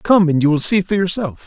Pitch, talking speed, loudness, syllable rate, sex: 175 Hz, 285 wpm, -16 LUFS, 5.6 syllables/s, male